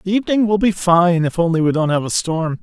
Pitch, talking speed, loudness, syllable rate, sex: 180 Hz, 275 wpm, -16 LUFS, 5.8 syllables/s, male